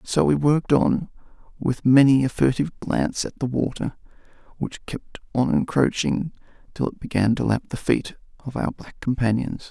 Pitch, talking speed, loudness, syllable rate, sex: 135 Hz, 165 wpm, -22 LUFS, 5.0 syllables/s, male